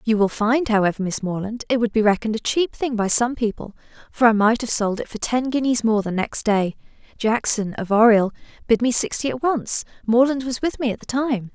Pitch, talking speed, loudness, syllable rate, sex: 230 Hz, 230 wpm, -20 LUFS, 5.5 syllables/s, female